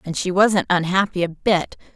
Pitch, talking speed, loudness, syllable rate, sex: 185 Hz, 185 wpm, -19 LUFS, 4.8 syllables/s, female